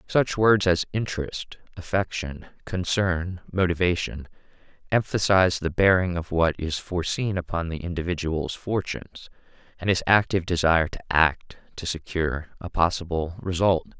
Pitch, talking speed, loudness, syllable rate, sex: 90 Hz, 125 wpm, -24 LUFS, 4.9 syllables/s, male